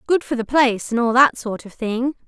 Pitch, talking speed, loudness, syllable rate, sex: 245 Hz, 240 wpm, -19 LUFS, 5.4 syllables/s, female